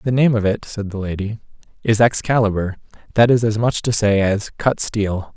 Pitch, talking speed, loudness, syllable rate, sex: 110 Hz, 200 wpm, -18 LUFS, 5.1 syllables/s, male